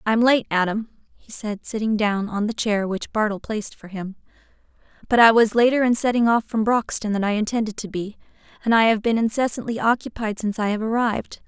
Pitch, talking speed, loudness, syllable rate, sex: 220 Hz, 200 wpm, -21 LUFS, 5.7 syllables/s, female